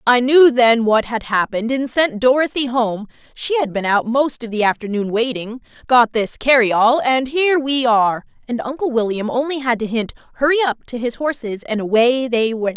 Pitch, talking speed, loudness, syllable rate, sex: 245 Hz, 190 wpm, -17 LUFS, 5.1 syllables/s, female